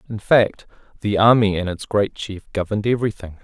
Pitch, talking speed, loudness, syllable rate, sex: 105 Hz, 175 wpm, -19 LUFS, 5.6 syllables/s, male